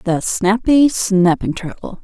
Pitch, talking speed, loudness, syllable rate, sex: 205 Hz, 120 wpm, -15 LUFS, 3.5 syllables/s, female